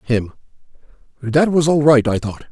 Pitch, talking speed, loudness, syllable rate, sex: 135 Hz, 165 wpm, -16 LUFS, 4.7 syllables/s, male